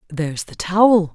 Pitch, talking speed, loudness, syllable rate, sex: 180 Hz, 155 wpm, -18 LUFS, 5.4 syllables/s, female